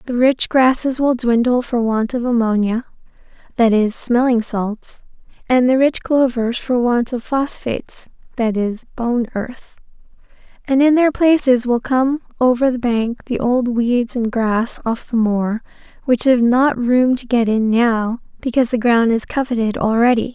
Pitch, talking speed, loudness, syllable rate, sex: 240 Hz, 165 wpm, -17 LUFS, 4.2 syllables/s, female